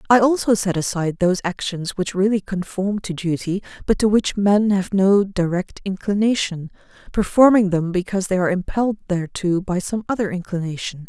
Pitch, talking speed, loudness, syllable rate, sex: 190 Hz, 160 wpm, -20 LUFS, 5.5 syllables/s, female